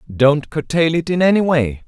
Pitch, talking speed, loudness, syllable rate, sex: 150 Hz, 190 wpm, -16 LUFS, 4.8 syllables/s, male